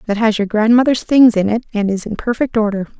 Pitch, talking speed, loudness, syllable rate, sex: 220 Hz, 240 wpm, -15 LUFS, 6.1 syllables/s, female